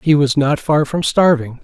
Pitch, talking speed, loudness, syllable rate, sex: 145 Hz, 220 wpm, -15 LUFS, 4.6 syllables/s, male